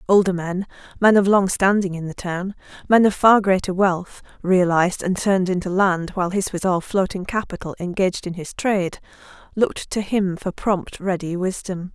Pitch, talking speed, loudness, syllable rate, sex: 185 Hz, 170 wpm, -20 LUFS, 5.2 syllables/s, female